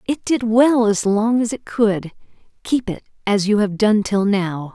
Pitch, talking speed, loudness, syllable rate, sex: 215 Hz, 200 wpm, -18 LUFS, 4.2 syllables/s, female